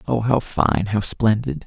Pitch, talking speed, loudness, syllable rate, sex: 100 Hz, 180 wpm, -20 LUFS, 4.1 syllables/s, male